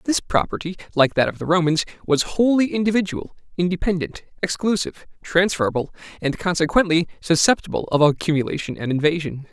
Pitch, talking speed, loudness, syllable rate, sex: 170 Hz, 125 wpm, -21 LUFS, 6.0 syllables/s, male